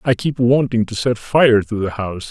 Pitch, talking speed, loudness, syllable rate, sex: 115 Hz, 235 wpm, -17 LUFS, 5.0 syllables/s, male